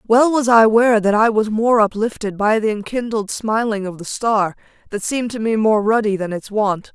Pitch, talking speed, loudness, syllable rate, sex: 215 Hz, 215 wpm, -17 LUFS, 4.9 syllables/s, female